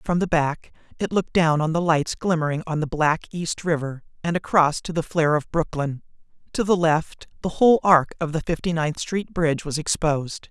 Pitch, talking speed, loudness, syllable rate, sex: 160 Hz, 205 wpm, -22 LUFS, 5.3 syllables/s, male